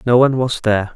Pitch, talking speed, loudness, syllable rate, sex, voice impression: 120 Hz, 250 wpm, -16 LUFS, 7.7 syllables/s, male, masculine, very adult-like, slightly weak, sincere, slightly calm, kind